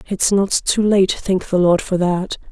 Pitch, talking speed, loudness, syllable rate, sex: 190 Hz, 215 wpm, -17 LUFS, 4.1 syllables/s, female